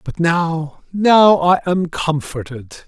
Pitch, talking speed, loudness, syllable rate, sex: 165 Hz, 125 wpm, -15 LUFS, 3.0 syllables/s, male